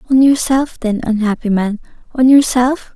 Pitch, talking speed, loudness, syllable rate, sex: 245 Hz, 140 wpm, -14 LUFS, 4.6 syllables/s, female